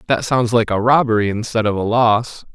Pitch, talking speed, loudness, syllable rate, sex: 115 Hz, 210 wpm, -16 LUFS, 5.2 syllables/s, male